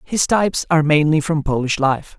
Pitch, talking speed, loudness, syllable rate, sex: 155 Hz, 190 wpm, -17 LUFS, 5.4 syllables/s, male